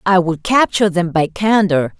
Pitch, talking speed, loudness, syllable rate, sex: 185 Hz, 180 wpm, -15 LUFS, 5.1 syllables/s, female